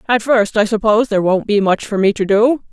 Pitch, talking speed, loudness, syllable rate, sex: 215 Hz, 265 wpm, -15 LUFS, 6.0 syllables/s, female